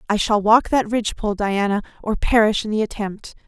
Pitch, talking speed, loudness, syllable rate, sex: 215 Hz, 190 wpm, -20 LUFS, 5.7 syllables/s, female